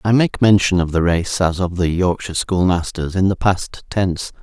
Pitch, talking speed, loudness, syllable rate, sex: 90 Hz, 205 wpm, -18 LUFS, 5.0 syllables/s, male